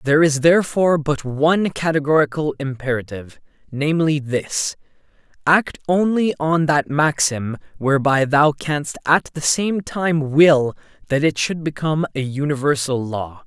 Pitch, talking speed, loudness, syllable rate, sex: 150 Hz, 130 wpm, -19 LUFS, 4.6 syllables/s, male